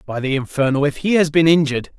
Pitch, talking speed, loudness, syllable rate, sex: 150 Hz, 210 wpm, -17 LUFS, 6.7 syllables/s, male